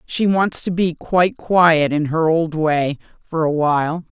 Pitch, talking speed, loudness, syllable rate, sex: 165 Hz, 185 wpm, -18 LUFS, 4.1 syllables/s, female